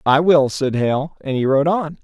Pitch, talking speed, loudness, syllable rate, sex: 145 Hz, 235 wpm, -17 LUFS, 4.3 syllables/s, male